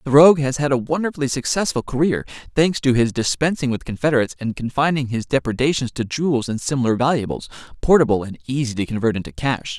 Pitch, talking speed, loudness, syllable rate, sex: 130 Hz, 185 wpm, -20 LUFS, 6.5 syllables/s, male